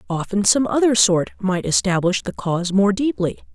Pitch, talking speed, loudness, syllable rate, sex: 200 Hz, 170 wpm, -19 LUFS, 5.0 syllables/s, female